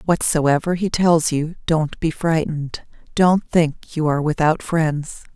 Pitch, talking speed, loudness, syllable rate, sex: 160 Hz, 145 wpm, -19 LUFS, 4.0 syllables/s, female